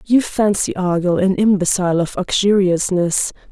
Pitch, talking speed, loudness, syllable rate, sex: 190 Hz, 120 wpm, -17 LUFS, 4.7 syllables/s, female